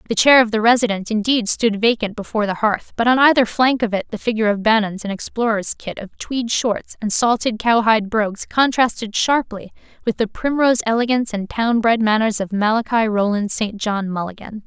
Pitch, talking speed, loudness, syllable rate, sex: 220 Hz, 190 wpm, -18 LUFS, 5.6 syllables/s, female